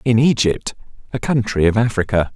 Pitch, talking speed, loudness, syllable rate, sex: 110 Hz, 155 wpm, -17 LUFS, 5.3 syllables/s, male